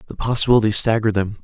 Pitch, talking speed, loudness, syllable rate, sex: 110 Hz, 165 wpm, -17 LUFS, 8.1 syllables/s, male